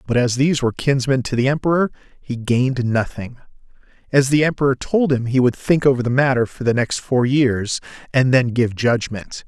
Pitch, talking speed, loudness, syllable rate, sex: 130 Hz, 195 wpm, -18 LUFS, 5.4 syllables/s, male